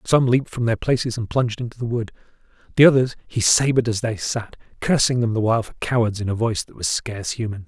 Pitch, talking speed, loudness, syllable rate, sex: 115 Hz, 235 wpm, -21 LUFS, 6.3 syllables/s, male